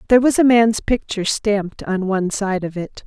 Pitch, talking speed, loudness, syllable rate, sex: 210 Hz, 215 wpm, -18 LUFS, 5.6 syllables/s, female